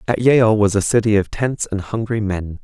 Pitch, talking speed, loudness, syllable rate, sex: 105 Hz, 230 wpm, -17 LUFS, 4.9 syllables/s, male